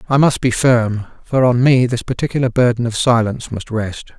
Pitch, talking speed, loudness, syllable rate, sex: 120 Hz, 200 wpm, -16 LUFS, 5.3 syllables/s, male